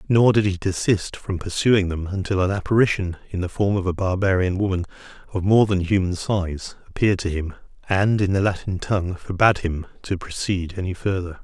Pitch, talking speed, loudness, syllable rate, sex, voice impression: 95 Hz, 190 wpm, -22 LUFS, 5.4 syllables/s, male, very masculine, very adult-like, very thick, tensed, powerful, slightly bright, slightly hard, slightly muffled, fluent, very cool, intellectual, slightly refreshing, sincere, very calm, very mature, friendly, reassuring, unique, elegant, wild, very sweet, slightly lively, very kind